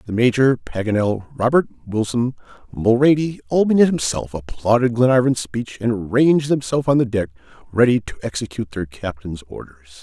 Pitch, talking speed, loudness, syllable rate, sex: 115 Hz, 140 wpm, -19 LUFS, 5.4 syllables/s, male